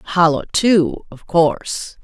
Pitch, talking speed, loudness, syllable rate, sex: 170 Hz, 120 wpm, -17 LUFS, 3.3 syllables/s, female